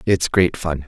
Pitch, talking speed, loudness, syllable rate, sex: 85 Hz, 205 wpm, -19 LUFS, 4.0 syllables/s, male